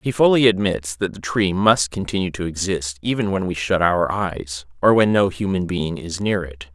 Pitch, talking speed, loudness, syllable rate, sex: 95 Hz, 215 wpm, -20 LUFS, 4.8 syllables/s, male